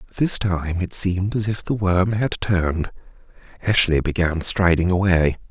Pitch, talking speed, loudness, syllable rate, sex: 95 Hz, 155 wpm, -20 LUFS, 4.8 syllables/s, male